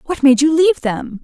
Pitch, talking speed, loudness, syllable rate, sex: 275 Hz, 245 wpm, -14 LUFS, 5.6 syllables/s, female